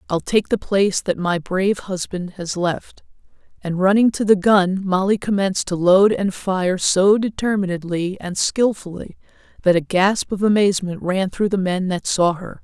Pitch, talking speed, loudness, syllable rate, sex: 190 Hz, 175 wpm, -19 LUFS, 4.7 syllables/s, female